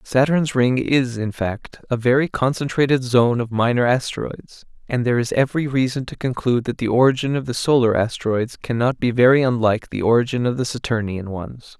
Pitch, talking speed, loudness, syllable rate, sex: 125 Hz, 185 wpm, -19 LUFS, 5.6 syllables/s, male